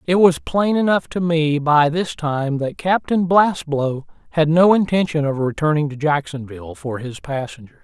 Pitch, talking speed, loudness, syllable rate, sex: 150 Hz, 170 wpm, -18 LUFS, 4.6 syllables/s, male